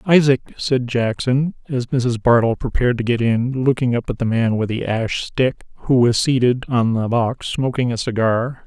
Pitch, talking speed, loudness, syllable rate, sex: 125 Hz, 195 wpm, -19 LUFS, 4.8 syllables/s, male